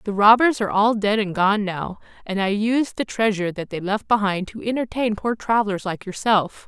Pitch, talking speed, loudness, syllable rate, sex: 210 Hz, 205 wpm, -21 LUFS, 5.4 syllables/s, female